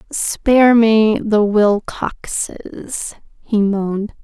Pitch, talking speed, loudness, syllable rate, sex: 215 Hz, 85 wpm, -16 LUFS, 2.7 syllables/s, female